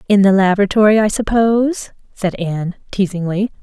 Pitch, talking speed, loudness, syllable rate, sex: 200 Hz, 130 wpm, -15 LUFS, 5.6 syllables/s, female